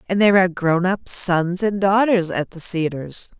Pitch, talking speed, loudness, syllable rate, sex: 185 Hz, 195 wpm, -18 LUFS, 4.8 syllables/s, female